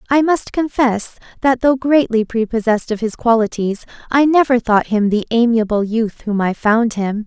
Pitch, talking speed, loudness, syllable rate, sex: 230 Hz, 175 wpm, -16 LUFS, 4.8 syllables/s, female